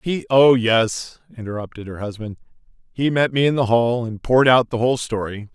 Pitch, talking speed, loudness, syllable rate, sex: 120 Hz, 185 wpm, -19 LUFS, 6.5 syllables/s, male